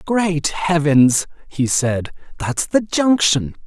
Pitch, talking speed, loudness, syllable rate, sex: 160 Hz, 115 wpm, -17 LUFS, 3.1 syllables/s, male